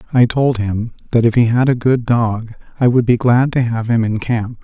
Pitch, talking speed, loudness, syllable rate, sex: 115 Hz, 245 wpm, -15 LUFS, 4.9 syllables/s, male